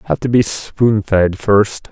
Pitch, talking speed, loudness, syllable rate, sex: 105 Hz, 155 wpm, -15 LUFS, 3.5 syllables/s, male